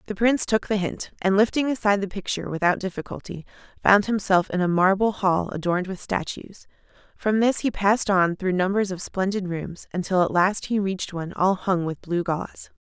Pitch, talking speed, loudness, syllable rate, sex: 190 Hz, 195 wpm, -23 LUFS, 5.6 syllables/s, female